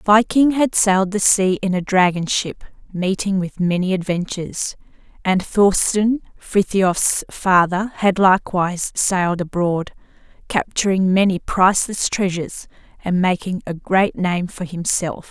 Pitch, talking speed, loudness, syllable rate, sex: 190 Hz, 125 wpm, -18 LUFS, 4.2 syllables/s, female